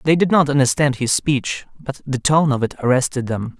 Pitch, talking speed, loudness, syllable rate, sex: 135 Hz, 215 wpm, -18 LUFS, 5.1 syllables/s, male